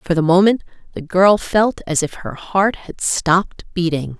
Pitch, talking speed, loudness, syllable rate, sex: 180 Hz, 185 wpm, -17 LUFS, 4.3 syllables/s, female